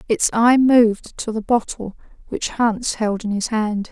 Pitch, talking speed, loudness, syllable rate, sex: 220 Hz, 185 wpm, -18 LUFS, 4.1 syllables/s, female